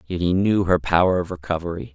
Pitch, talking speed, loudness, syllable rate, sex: 90 Hz, 215 wpm, -21 LUFS, 6.1 syllables/s, male